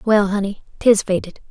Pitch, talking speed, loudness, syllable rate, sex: 205 Hz, 160 wpm, -18 LUFS, 5.0 syllables/s, female